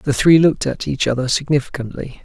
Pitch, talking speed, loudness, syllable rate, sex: 140 Hz, 190 wpm, -17 LUFS, 5.9 syllables/s, male